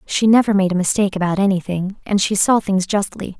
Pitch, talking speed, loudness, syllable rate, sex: 195 Hz, 210 wpm, -17 LUFS, 6.0 syllables/s, female